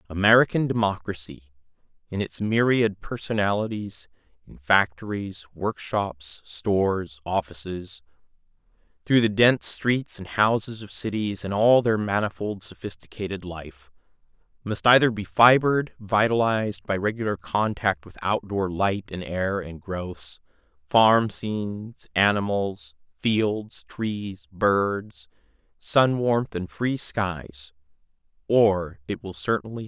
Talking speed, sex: 115 wpm, male